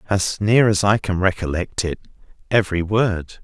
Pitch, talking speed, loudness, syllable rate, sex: 95 Hz, 155 wpm, -19 LUFS, 4.8 syllables/s, male